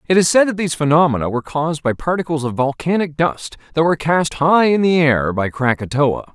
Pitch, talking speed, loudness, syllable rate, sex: 150 Hz, 210 wpm, -17 LUFS, 5.8 syllables/s, male